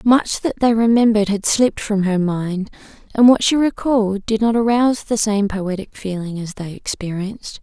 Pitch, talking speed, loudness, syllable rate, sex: 210 Hz, 180 wpm, -18 LUFS, 5.1 syllables/s, female